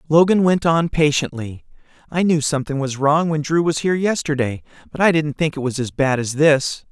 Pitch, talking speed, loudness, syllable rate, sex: 150 Hz, 210 wpm, -18 LUFS, 5.4 syllables/s, male